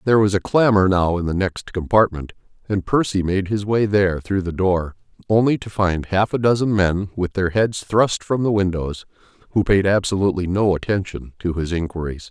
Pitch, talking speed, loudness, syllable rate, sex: 95 Hz, 195 wpm, -19 LUFS, 5.2 syllables/s, male